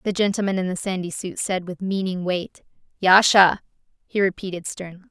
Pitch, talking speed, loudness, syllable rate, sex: 190 Hz, 165 wpm, -21 LUFS, 5.3 syllables/s, female